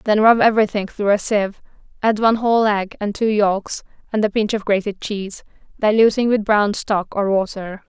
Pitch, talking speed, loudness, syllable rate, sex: 210 Hz, 190 wpm, -18 LUFS, 5.4 syllables/s, female